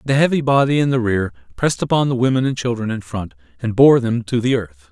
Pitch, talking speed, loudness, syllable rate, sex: 120 Hz, 245 wpm, -18 LUFS, 6.1 syllables/s, male